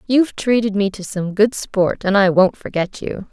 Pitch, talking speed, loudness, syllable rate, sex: 205 Hz, 215 wpm, -18 LUFS, 4.8 syllables/s, female